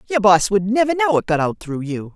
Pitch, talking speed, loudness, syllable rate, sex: 205 Hz, 280 wpm, -18 LUFS, 5.6 syllables/s, female